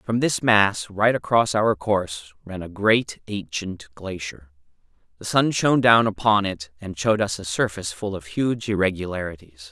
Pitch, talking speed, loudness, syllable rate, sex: 100 Hz, 165 wpm, -22 LUFS, 4.7 syllables/s, male